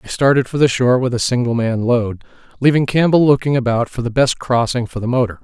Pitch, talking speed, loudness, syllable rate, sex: 125 Hz, 230 wpm, -16 LUFS, 6.1 syllables/s, male